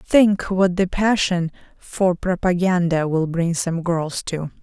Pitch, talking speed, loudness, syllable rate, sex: 175 Hz, 145 wpm, -20 LUFS, 3.6 syllables/s, female